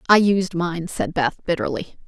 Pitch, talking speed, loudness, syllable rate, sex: 175 Hz, 175 wpm, -21 LUFS, 4.6 syllables/s, female